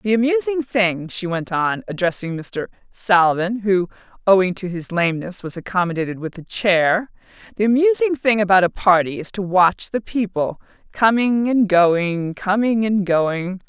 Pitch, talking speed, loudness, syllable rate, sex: 190 Hz, 155 wpm, -19 LUFS, 4.5 syllables/s, female